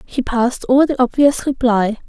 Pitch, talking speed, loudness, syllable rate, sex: 250 Hz, 175 wpm, -16 LUFS, 5.4 syllables/s, female